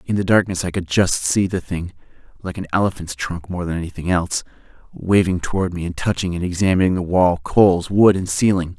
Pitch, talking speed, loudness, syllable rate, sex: 90 Hz, 190 wpm, -19 LUFS, 5.8 syllables/s, male